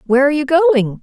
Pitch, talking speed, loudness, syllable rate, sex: 285 Hz, 235 wpm, -13 LUFS, 6.6 syllables/s, female